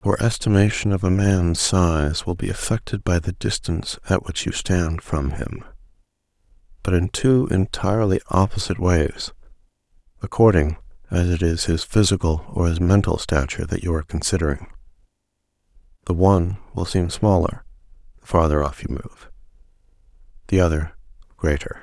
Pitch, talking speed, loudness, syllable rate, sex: 90 Hz, 140 wpm, -21 LUFS, 5.2 syllables/s, male